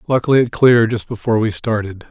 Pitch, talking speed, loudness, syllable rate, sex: 115 Hz, 200 wpm, -16 LUFS, 6.8 syllables/s, male